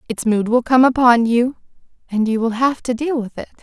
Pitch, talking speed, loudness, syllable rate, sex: 240 Hz, 230 wpm, -17 LUFS, 5.3 syllables/s, female